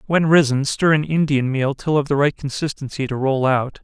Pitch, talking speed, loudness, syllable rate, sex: 140 Hz, 220 wpm, -19 LUFS, 5.2 syllables/s, male